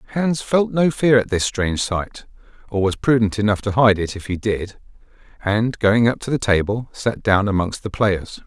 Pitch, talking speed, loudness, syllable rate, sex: 110 Hz, 205 wpm, -19 LUFS, 4.8 syllables/s, male